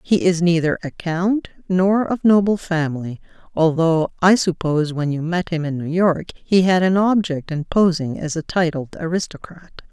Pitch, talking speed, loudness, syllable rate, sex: 170 Hz, 175 wpm, -19 LUFS, 4.8 syllables/s, female